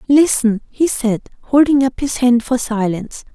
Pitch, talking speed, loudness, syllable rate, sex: 245 Hz, 160 wpm, -16 LUFS, 4.7 syllables/s, female